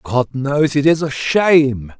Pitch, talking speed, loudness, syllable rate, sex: 140 Hz, 180 wpm, -15 LUFS, 3.9 syllables/s, male